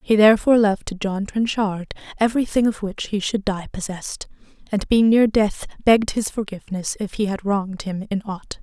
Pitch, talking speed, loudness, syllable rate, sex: 205 Hz, 190 wpm, -21 LUFS, 5.5 syllables/s, female